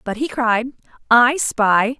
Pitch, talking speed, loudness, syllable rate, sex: 240 Hz, 150 wpm, -17 LUFS, 3.3 syllables/s, female